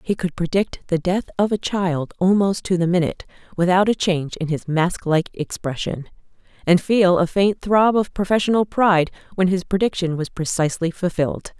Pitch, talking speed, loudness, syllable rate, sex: 180 Hz, 175 wpm, -20 LUFS, 5.3 syllables/s, female